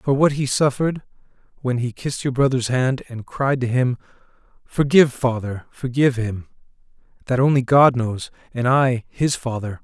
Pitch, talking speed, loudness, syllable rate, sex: 125 Hz, 145 wpm, -20 LUFS, 4.9 syllables/s, male